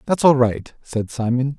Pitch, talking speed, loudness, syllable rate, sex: 130 Hz, 190 wpm, -19 LUFS, 4.4 syllables/s, male